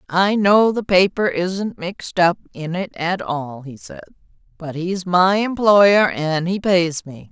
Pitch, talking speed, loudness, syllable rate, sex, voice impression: 180 Hz, 170 wpm, -18 LUFS, 3.7 syllables/s, female, feminine, middle-aged, tensed, powerful, clear, slightly halting, nasal, intellectual, calm, slightly friendly, reassuring, unique, elegant, lively, slightly sharp